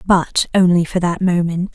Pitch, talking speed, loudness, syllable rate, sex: 175 Hz, 170 wpm, -16 LUFS, 4.5 syllables/s, female